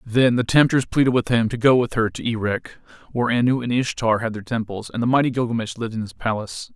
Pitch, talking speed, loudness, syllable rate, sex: 115 Hz, 240 wpm, -21 LUFS, 6.3 syllables/s, male